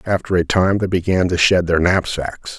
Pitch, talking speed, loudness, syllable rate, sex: 90 Hz, 210 wpm, -17 LUFS, 4.9 syllables/s, male